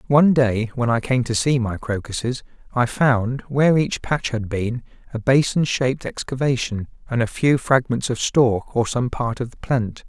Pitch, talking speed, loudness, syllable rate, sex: 125 Hz, 190 wpm, -21 LUFS, 4.7 syllables/s, male